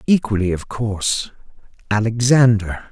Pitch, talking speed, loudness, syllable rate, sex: 110 Hz, 60 wpm, -18 LUFS, 4.6 syllables/s, male